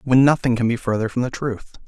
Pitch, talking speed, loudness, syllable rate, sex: 125 Hz, 255 wpm, -20 LUFS, 6.1 syllables/s, male